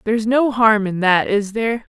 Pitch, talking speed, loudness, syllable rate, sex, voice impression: 215 Hz, 215 wpm, -17 LUFS, 5.1 syllables/s, female, very feminine, adult-like, slightly middle-aged, thin, tensed, powerful, bright, very hard, very clear, slightly halting, slightly raspy, slightly cute, cool, intellectual, refreshing, sincere, slightly calm, slightly friendly, reassuring, very unique, slightly elegant, wild, slightly sweet, lively, strict, slightly intense, very sharp, light